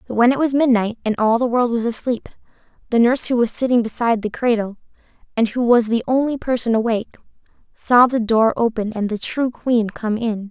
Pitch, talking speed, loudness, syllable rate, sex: 235 Hz, 205 wpm, -18 LUFS, 5.8 syllables/s, female